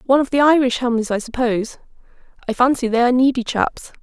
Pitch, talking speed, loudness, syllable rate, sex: 250 Hz, 195 wpm, -18 LUFS, 6.7 syllables/s, female